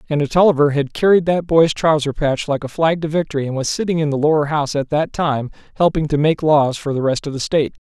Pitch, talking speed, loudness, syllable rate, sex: 150 Hz, 260 wpm, -17 LUFS, 6.1 syllables/s, male